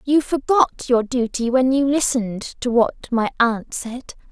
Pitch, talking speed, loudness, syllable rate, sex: 250 Hz, 165 wpm, -19 LUFS, 4.0 syllables/s, female